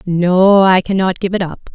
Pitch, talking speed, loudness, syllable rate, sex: 185 Hz, 205 wpm, -13 LUFS, 4.4 syllables/s, female